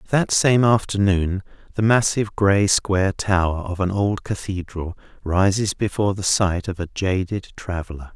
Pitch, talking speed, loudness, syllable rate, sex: 95 Hz, 145 wpm, -21 LUFS, 4.7 syllables/s, male